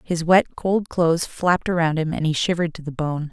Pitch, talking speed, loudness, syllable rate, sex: 165 Hz, 235 wpm, -21 LUFS, 5.6 syllables/s, female